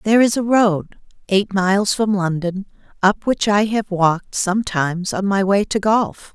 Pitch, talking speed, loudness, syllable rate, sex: 200 Hz, 180 wpm, -18 LUFS, 4.6 syllables/s, female